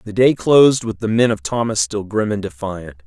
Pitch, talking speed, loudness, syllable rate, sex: 105 Hz, 235 wpm, -17 LUFS, 5.1 syllables/s, male